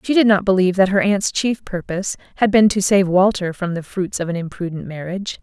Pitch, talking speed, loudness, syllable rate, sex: 190 Hz, 230 wpm, -18 LUFS, 5.9 syllables/s, female